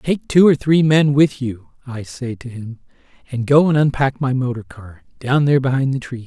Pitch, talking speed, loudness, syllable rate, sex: 130 Hz, 220 wpm, -17 LUFS, 5.0 syllables/s, male